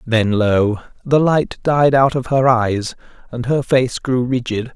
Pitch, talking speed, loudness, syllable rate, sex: 125 Hz, 175 wpm, -16 LUFS, 3.7 syllables/s, male